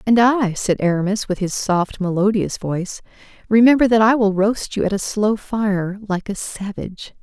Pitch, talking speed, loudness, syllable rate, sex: 205 Hz, 185 wpm, -18 LUFS, 4.8 syllables/s, female